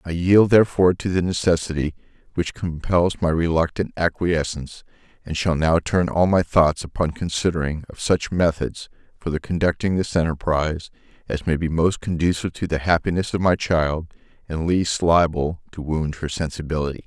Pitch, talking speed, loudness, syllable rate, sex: 85 Hz, 160 wpm, -21 LUFS, 5.2 syllables/s, male